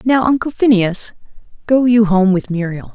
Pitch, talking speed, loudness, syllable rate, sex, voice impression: 215 Hz, 165 wpm, -14 LUFS, 4.7 syllables/s, female, feminine, adult-like, tensed, powerful, slightly hard, clear, fluent, intellectual, calm, slightly reassuring, elegant, slightly strict